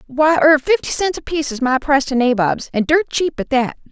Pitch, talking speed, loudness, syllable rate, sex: 275 Hz, 215 wpm, -16 LUFS, 5.7 syllables/s, female